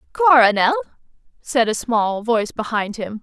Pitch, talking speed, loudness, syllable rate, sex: 240 Hz, 130 wpm, -18 LUFS, 4.7 syllables/s, female